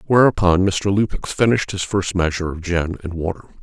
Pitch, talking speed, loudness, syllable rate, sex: 90 Hz, 180 wpm, -19 LUFS, 5.9 syllables/s, male